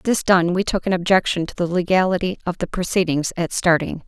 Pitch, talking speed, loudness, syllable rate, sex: 180 Hz, 205 wpm, -20 LUFS, 5.7 syllables/s, female